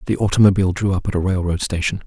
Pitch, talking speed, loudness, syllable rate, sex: 95 Hz, 235 wpm, -18 LUFS, 7.3 syllables/s, male